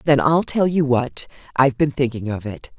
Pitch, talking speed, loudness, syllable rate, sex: 140 Hz, 215 wpm, -19 LUFS, 5.1 syllables/s, female